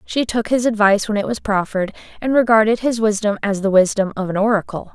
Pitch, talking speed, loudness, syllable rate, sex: 210 Hz, 220 wpm, -18 LUFS, 6.2 syllables/s, female